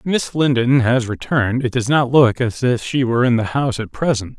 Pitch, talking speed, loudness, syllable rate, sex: 125 Hz, 245 wpm, -17 LUFS, 5.5 syllables/s, male